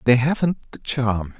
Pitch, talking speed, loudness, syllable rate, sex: 125 Hz, 170 wpm, -22 LUFS, 4.1 syllables/s, male